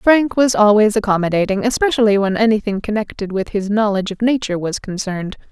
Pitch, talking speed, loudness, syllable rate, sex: 210 Hz, 165 wpm, -17 LUFS, 6.2 syllables/s, female